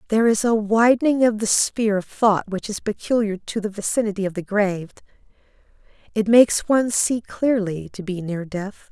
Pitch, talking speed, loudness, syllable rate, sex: 210 Hz, 180 wpm, -20 LUFS, 5.4 syllables/s, female